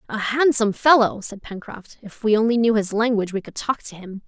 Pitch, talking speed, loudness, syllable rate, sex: 220 Hz, 225 wpm, -20 LUFS, 5.7 syllables/s, female